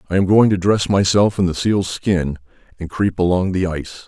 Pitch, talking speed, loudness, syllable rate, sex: 95 Hz, 220 wpm, -17 LUFS, 5.2 syllables/s, male